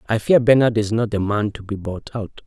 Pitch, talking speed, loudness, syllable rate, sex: 110 Hz, 265 wpm, -19 LUFS, 5.4 syllables/s, male